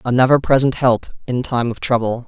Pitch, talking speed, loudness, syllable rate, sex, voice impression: 125 Hz, 210 wpm, -17 LUFS, 5.5 syllables/s, male, masculine, adult-like, slightly refreshing, slightly friendly, kind